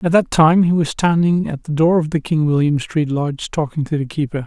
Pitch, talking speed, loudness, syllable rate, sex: 155 Hz, 255 wpm, -17 LUFS, 5.5 syllables/s, male